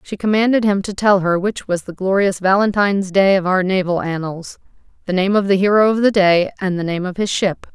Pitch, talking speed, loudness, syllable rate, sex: 190 Hz, 230 wpm, -16 LUFS, 5.5 syllables/s, female